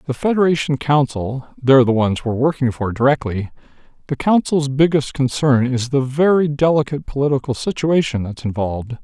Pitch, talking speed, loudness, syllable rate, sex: 135 Hz, 135 wpm, -18 LUFS, 5.5 syllables/s, male